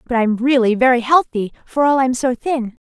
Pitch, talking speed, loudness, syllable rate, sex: 250 Hz, 210 wpm, -16 LUFS, 5.1 syllables/s, female